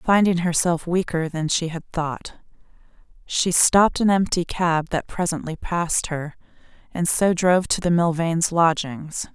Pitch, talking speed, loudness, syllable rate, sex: 170 Hz, 150 wpm, -21 LUFS, 4.3 syllables/s, female